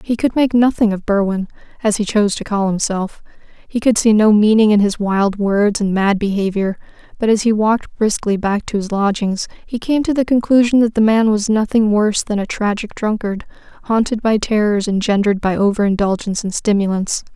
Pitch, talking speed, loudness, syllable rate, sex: 210 Hz, 190 wpm, -16 LUFS, 5.4 syllables/s, female